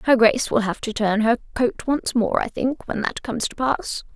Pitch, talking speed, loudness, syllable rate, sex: 235 Hz, 245 wpm, -22 LUFS, 5.1 syllables/s, female